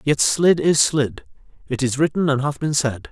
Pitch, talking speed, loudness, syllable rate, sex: 135 Hz, 195 wpm, -19 LUFS, 4.6 syllables/s, male